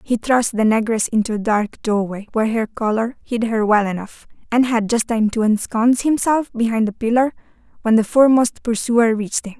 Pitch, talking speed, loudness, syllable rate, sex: 225 Hz, 195 wpm, -18 LUFS, 5.4 syllables/s, female